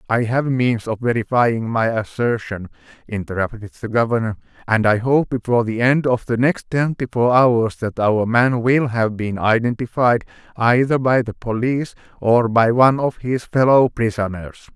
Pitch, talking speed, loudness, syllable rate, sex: 120 Hz, 165 wpm, -18 LUFS, 4.7 syllables/s, male